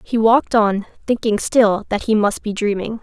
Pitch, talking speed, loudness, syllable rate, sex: 215 Hz, 200 wpm, -17 LUFS, 4.9 syllables/s, female